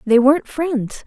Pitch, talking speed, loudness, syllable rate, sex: 270 Hz, 170 wpm, -17 LUFS, 4.2 syllables/s, female